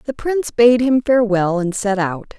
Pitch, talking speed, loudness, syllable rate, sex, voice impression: 220 Hz, 200 wpm, -16 LUFS, 4.9 syllables/s, female, feminine, middle-aged, tensed, powerful, bright, clear, slightly halting, slightly nasal, elegant, lively, slightly intense, slightly sharp